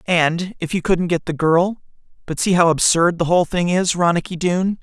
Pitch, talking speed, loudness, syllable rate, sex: 175 Hz, 200 wpm, -18 LUFS, 5.2 syllables/s, male